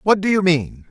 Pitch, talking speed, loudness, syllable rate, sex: 170 Hz, 265 wpm, -17 LUFS, 5.1 syllables/s, male